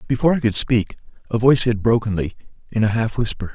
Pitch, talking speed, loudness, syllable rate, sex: 115 Hz, 205 wpm, -19 LUFS, 6.8 syllables/s, male